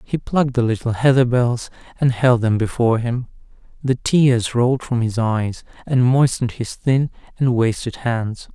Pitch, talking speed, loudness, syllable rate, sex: 120 Hz, 170 wpm, -19 LUFS, 4.7 syllables/s, male